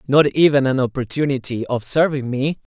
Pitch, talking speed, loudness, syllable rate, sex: 135 Hz, 150 wpm, -19 LUFS, 5.3 syllables/s, male